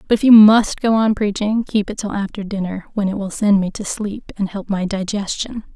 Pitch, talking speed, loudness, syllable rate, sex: 205 Hz, 240 wpm, -17 LUFS, 5.2 syllables/s, female